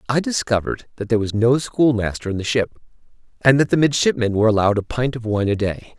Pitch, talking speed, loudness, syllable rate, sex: 120 Hz, 220 wpm, -19 LUFS, 6.5 syllables/s, male